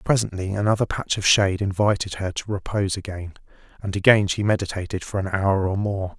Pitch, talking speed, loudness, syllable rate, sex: 100 Hz, 185 wpm, -22 LUFS, 6.0 syllables/s, male